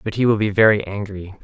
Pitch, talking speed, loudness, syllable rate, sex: 105 Hz, 250 wpm, -18 LUFS, 6.1 syllables/s, male